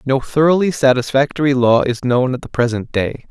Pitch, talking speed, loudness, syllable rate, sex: 135 Hz, 180 wpm, -16 LUFS, 5.4 syllables/s, male